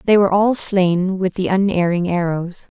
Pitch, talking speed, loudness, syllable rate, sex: 185 Hz, 175 wpm, -17 LUFS, 4.7 syllables/s, female